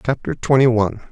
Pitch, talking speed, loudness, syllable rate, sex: 120 Hz, 160 wpm, -17 LUFS, 6.5 syllables/s, male